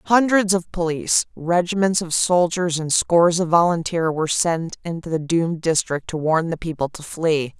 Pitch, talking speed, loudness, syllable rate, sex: 170 Hz, 175 wpm, -20 LUFS, 4.9 syllables/s, female